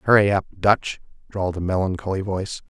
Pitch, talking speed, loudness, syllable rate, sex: 95 Hz, 150 wpm, -22 LUFS, 6.1 syllables/s, male